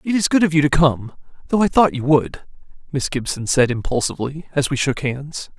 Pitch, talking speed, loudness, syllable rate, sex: 145 Hz, 205 wpm, -19 LUFS, 5.4 syllables/s, male